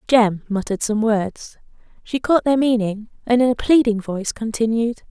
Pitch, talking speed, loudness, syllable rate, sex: 225 Hz, 165 wpm, -19 LUFS, 5.0 syllables/s, female